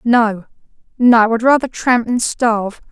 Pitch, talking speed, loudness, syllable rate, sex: 230 Hz, 145 wpm, -14 LUFS, 4.0 syllables/s, female